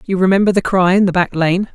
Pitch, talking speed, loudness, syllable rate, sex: 185 Hz, 275 wpm, -14 LUFS, 6.2 syllables/s, male